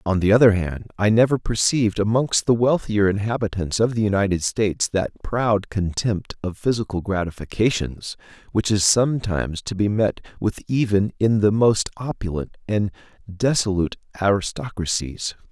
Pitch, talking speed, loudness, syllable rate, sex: 105 Hz, 140 wpm, -21 LUFS, 5.0 syllables/s, male